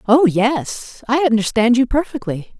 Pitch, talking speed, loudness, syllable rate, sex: 245 Hz, 115 wpm, -17 LUFS, 4.2 syllables/s, female